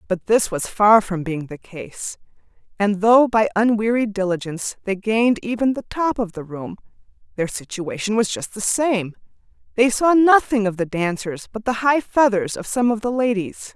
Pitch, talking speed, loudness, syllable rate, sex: 210 Hz, 185 wpm, -20 LUFS, 4.8 syllables/s, female